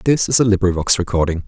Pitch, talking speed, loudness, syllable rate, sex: 95 Hz, 205 wpm, -16 LUFS, 6.8 syllables/s, male